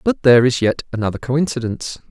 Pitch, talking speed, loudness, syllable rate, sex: 125 Hz, 170 wpm, -17 LUFS, 6.5 syllables/s, male